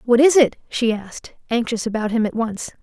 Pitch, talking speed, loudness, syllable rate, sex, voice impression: 235 Hz, 210 wpm, -19 LUFS, 5.5 syllables/s, female, feminine, slightly adult-like, slightly fluent, slightly intellectual, calm